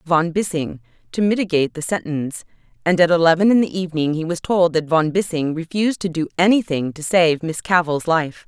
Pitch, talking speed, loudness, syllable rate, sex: 170 Hz, 190 wpm, -19 LUFS, 5.7 syllables/s, female